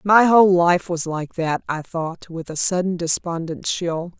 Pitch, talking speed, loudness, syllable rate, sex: 175 Hz, 185 wpm, -20 LUFS, 4.3 syllables/s, female